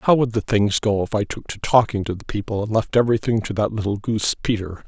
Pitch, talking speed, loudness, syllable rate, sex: 110 Hz, 260 wpm, -21 LUFS, 6.1 syllables/s, male